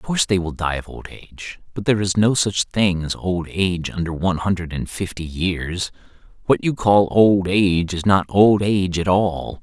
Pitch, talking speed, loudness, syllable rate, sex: 90 Hz, 210 wpm, -19 LUFS, 5.0 syllables/s, male